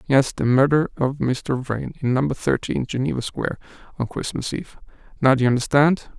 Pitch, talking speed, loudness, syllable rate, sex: 135 Hz, 175 wpm, -21 LUFS, 5.4 syllables/s, male